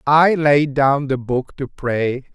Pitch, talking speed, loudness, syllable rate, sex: 140 Hz, 180 wpm, -17 LUFS, 3.3 syllables/s, male